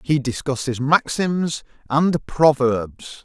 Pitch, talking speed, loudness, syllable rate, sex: 140 Hz, 95 wpm, -20 LUFS, 3.2 syllables/s, male